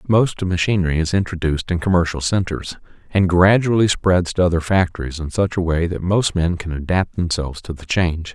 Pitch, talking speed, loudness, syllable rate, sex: 90 Hz, 185 wpm, -19 LUFS, 5.6 syllables/s, male